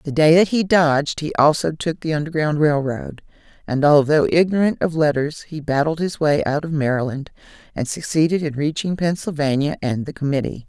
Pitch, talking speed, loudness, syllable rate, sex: 150 Hz, 180 wpm, -19 LUFS, 5.3 syllables/s, female